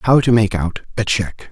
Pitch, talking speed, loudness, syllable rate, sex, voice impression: 105 Hz, 240 wpm, -17 LUFS, 4.5 syllables/s, male, masculine, adult-like, thick, tensed, soft, clear, fluent, cool, intellectual, calm, mature, reassuring, wild, lively, kind